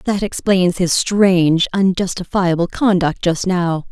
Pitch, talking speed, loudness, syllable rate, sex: 180 Hz, 125 wpm, -16 LUFS, 4.0 syllables/s, female